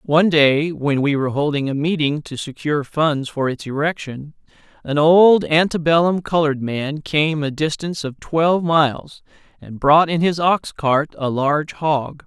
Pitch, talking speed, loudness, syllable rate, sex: 150 Hz, 170 wpm, -18 LUFS, 4.6 syllables/s, male